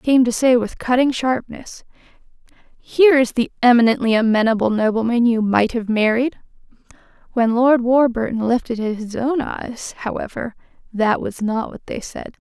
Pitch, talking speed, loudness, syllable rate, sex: 240 Hz, 145 wpm, -18 LUFS, 4.8 syllables/s, female